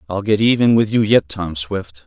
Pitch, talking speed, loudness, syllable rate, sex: 100 Hz, 235 wpm, -17 LUFS, 4.8 syllables/s, male